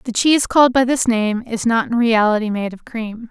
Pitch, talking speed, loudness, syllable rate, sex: 230 Hz, 235 wpm, -17 LUFS, 5.4 syllables/s, female